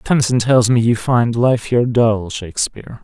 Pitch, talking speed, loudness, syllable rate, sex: 115 Hz, 180 wpm, -16 LUFS, 5.0 syllables/s, male